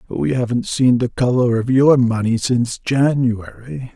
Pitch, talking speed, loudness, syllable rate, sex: 125 Hz, 150 wpm, -17 LUFS, 4.2 syllables/s, male